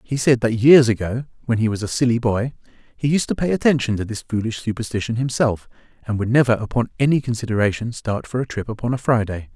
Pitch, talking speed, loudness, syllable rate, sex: 115 Hz, 215 wpm, -20 LUFS, 6.2 syllables/s, male